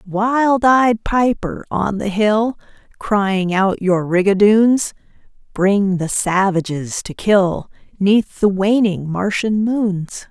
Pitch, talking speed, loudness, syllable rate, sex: 205 Hz, 115 wpm, -16 LUFS, 3.1 syllables/s, female